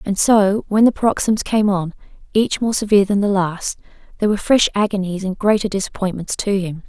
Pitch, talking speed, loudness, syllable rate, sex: 200 Hz, 190 wpm, -18 LUFS, 5.6 syllables/s, female